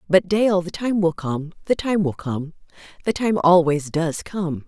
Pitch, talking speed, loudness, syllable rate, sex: 175 Hz, 180 wpm, -21 LUFS, 4.3 syllables/s, female